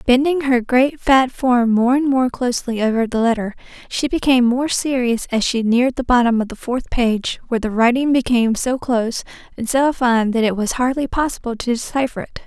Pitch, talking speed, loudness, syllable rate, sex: 245 Hz, 200 wpm, -18 LUFS, 5.4 syllables/s, female